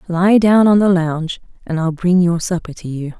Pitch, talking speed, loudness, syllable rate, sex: 175 Hz, 225 wpm, -15 LUFS, 5.1 syllables/s, female